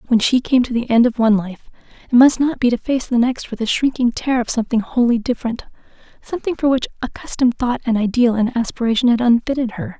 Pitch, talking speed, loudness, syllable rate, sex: 240 Hz, 215 wpm, -17 LUFS, 6.4 syllables/s, female